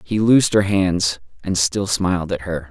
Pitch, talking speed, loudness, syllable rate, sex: 95 Hz, 200 wpm, -18 LUFS, 4.6 syllables/s, male